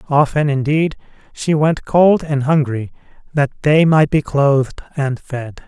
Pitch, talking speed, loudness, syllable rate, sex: 145 Hz, 150 wpm, -16 LUFS, 4.1 syllables/s, male